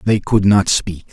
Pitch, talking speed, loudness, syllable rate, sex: 100 Hz, 215 wpm, -15 LUFS, 4.2 syllables/s, male